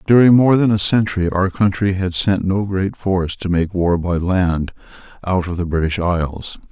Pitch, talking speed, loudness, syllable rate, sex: 95 Hz, 195 wpm, -17 LUFS, 4.9 syllables/s, male